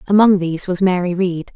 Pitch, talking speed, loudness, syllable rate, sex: 185 Hz, 190 wpm, -16 LUFS, 5.8 syllables/s, female